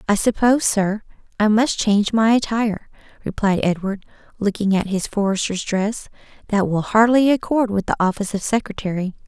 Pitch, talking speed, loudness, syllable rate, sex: 210 Hz, 155 wpm, -19 LUFS, 5.5 syllables/s, female